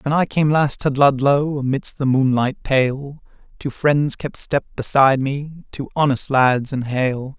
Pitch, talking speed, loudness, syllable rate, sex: 135 Hz, 170 wpm, -18 LUFS, 4.1 syllables/s, male